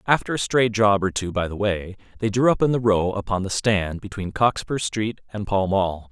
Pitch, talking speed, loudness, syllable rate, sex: 105 Hz, 235 wpm, -22 LUFS, 5.0 syllables/s, male